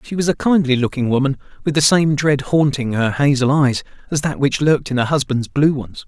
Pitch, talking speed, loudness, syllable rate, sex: 140 Hz, 225 wpm, -17 LUFS, 5.5 syllables/s, male